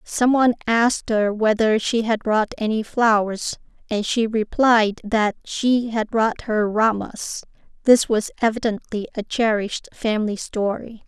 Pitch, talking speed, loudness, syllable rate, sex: 220 Hz, 140 wpm, -20 LUFS, 4.2 syllables/s, female